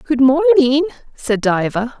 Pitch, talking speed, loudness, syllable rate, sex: 275 Hz, 120 wpm, -15 LUFS, 3.5 syllables/s, female